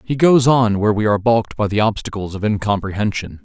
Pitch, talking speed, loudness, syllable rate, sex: 110 Hz, 210 wpm, -17 LUFS, 6.3 syllables/s, male